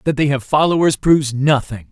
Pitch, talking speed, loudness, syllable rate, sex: 140 Hz, 190 wpm, -16 LUFS, 5.6 syllables/s, male